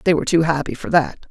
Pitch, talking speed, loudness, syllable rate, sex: 155 Hz, 275 wpm, -18 LUFS, 7.3 syllables/s, female